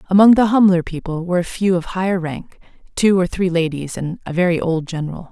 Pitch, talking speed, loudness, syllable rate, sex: 175 Hz, 205 wpm, -17 LUFS, 5.9 syllables/s, female